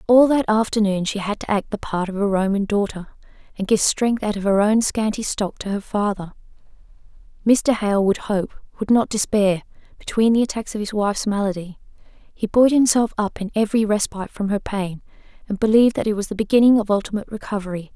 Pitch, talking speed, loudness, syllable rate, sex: 210 Hz, 195 wpm, -20 LUFS, 5.9 syllables/s, female